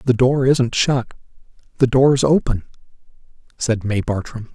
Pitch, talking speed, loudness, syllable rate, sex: 125 Hz, 130 wpm, -18 LUFS, 4.3 syllables/s, male